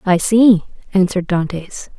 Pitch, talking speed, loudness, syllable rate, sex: 190 Hz, 120 wpm, -15 LUFS, 4.6 syllables/s, female